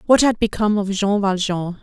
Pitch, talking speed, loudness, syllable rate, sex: 205 Hz, 195 wpm, -19 LUFS, 5.4 syllables/s, female